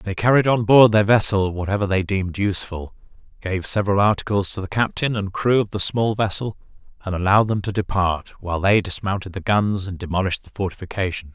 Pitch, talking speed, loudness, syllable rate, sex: 100 Hz, 190 wpm, -20 LUFS, 6.0 syllables/s, male